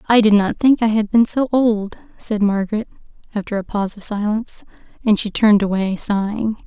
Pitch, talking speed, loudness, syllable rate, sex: 210 Hz, 190 wpm, -18 LUFS, 5.7 syllables/s, female